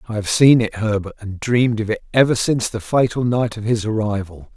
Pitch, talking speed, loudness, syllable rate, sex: 110 Hz, 225 wpm, -18 LUFS, 5.7 syllables/s, male